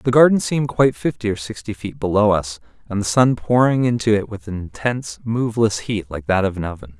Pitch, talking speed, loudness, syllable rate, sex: 110 Hz, 225 wpm, -19 LUFS, 5.9 syllables/s, male